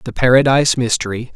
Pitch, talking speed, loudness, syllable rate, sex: 125 Hz, 135 wpm, -14 LUFS, 6.5 syllables/s, male